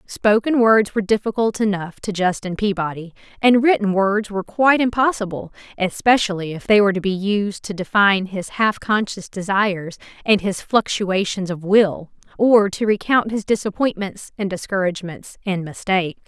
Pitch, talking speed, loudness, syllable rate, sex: 200 Hz, 150 wpm, -19 LUFS, 5.1 syllables/s, female